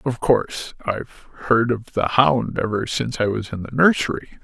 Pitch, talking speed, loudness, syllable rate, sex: 120 Hz, 190 wpm, -20 LUFS, 5.2 syllables/s, male